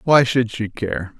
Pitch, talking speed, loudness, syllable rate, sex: 115 Hz, 200 wpm, -20 LUFS, 3.8 syllables/s, male